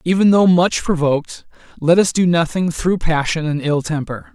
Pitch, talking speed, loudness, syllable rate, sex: 165 Hz, 180 wpm, -16 LUFS, 4.8 syllables/s, male